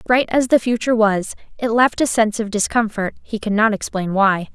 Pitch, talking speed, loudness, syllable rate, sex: 220 Hz, 210 wpm, -18 LUFS, 5.4 syllables/s, female